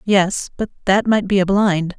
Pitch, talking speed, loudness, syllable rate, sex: 195 Hz, 210 wpm, -17 LUFS, 4.2 syllables/s, female